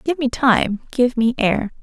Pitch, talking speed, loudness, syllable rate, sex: 240 Hz, 195 wpm, -18 LUFS, 3.9 syllables/s, female